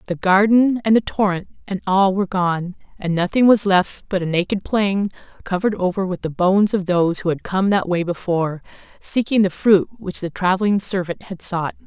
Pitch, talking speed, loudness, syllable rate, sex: 190 Hz, 195 wpm, -19 LUFS, 5.3 syllables/s, female